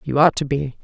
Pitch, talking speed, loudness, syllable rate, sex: 145 Hz, 285 wpm, -19 LUFS, 5.6 syllables/s, female